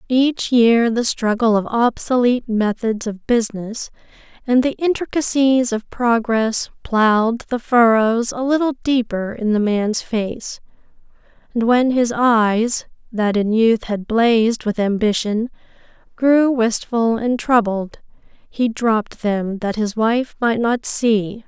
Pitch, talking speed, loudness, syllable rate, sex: 230 Hz, 135 wpm, -18 LUFS, 3.8 syllables/s, female